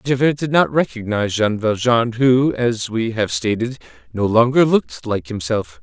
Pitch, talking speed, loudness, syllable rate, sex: 120 Hz, 165 wpm, -18 LUFS, 4.6 syllables/s, male